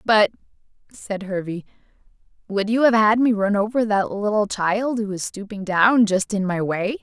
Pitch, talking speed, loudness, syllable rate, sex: 205 Hz, 180 wpm, -20 LUFS, 4.6 syllables/s, female